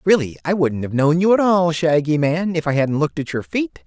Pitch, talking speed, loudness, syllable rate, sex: 155 Hz, 265 wpm, -18 LUFS, 5.4 syllables/s, male